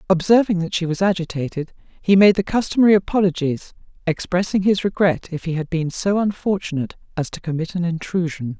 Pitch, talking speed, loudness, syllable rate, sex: 180 Hz, 170 wpm, -20 LUFS, 5.8 syllables/s, female